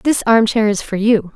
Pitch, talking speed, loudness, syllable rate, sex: 215 Hz, 220 wpm, -15 LUFS, 4.7 syllables/s, female